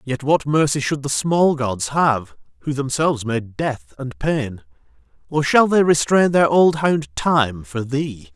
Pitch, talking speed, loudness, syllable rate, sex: 135 Hz, 170 wpm, -19 LUFS, 3.9 syllables/s, male